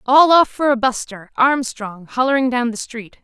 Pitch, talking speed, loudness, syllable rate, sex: 250 Hz, 185 wpm, -17 LUFS, 4.6 syllables/s, female